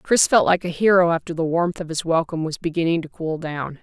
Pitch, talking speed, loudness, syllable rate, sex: 165 Hz, 250 wpm, -20 LUFS, 5.8 syllables/s, female